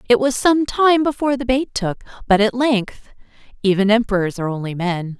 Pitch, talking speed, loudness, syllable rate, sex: 225 Hz, 175 wpm, -18 LUFS, 5.3 syllables/s, female